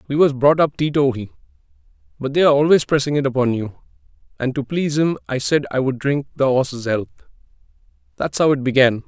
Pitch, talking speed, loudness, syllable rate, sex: 140 Hz, 185 wpm, -18 LUFS, 6.1 syllables/s, male